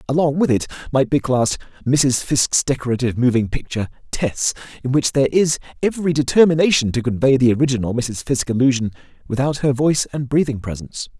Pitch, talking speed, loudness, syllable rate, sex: 130 Hz, 165 wpm, -18 LUFS, 6.5 syllables/s, male